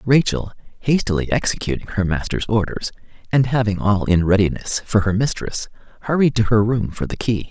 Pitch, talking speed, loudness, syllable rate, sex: 110 Hz, 170 wpm, -20 LUFS, 5.4 syllables/s, male